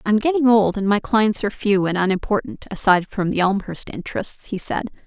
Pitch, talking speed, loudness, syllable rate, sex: 205 Hz, 200 wpm, -20 LUFS, 5.8 syllables/s, female